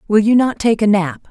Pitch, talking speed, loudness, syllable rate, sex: 210 Hz, 275 wpm, -14 LUFS, 5.2 syllables/s, female